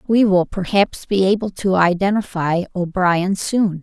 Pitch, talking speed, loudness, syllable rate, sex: 190 Hz, 140 wpm, -18 LUFS, 4.2 syllables/s, female